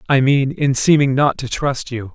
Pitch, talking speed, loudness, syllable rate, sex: 135 Hz, 225 wpm, -16 LUFS, 4.6 syllables/s, male